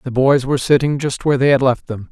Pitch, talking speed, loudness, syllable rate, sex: 135 Hz, 285 wpm, -16 LUFS, 6.5 syllables/s, male